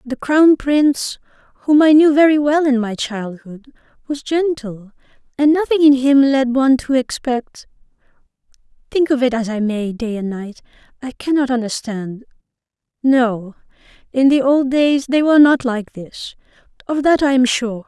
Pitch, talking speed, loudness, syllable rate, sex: 260 Hz, 160 wpm, -16 LUFS, 4.6 syllables/s, female